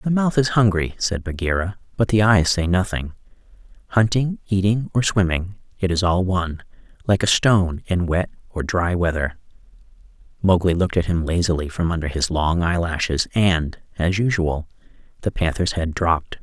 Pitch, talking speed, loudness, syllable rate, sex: 90 Hz, 155 wpm, -21 LUFS, 5.1 syllables/s, male